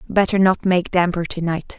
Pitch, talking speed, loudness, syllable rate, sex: 180 Hz, 200 wpm, -19 LUFS, 5.0 syllables/s, female